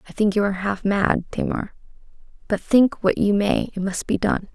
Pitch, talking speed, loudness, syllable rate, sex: 205 Hz, 210 wpm, -21 LUFS, 5.2 syllables/s, female